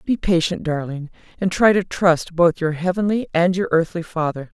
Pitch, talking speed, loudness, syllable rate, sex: 175 Hz, 185 wpm, -19 LUFS, 4.9 syllables/s, female